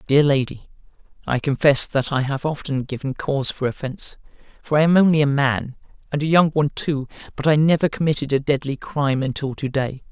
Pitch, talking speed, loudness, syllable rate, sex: 140 Hz, 190 wpm, -20 LUFS, 5.8 syllables/s, male